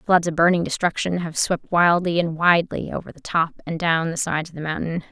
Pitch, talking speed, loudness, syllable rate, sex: 165 Hz, 225 wpm, -21 LUFS, 5.8 syllables/s, female